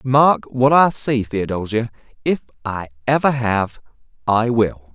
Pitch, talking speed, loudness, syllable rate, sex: 115 Hz, 145 wpm, -19 LUFS, 4.0 syllables/s, male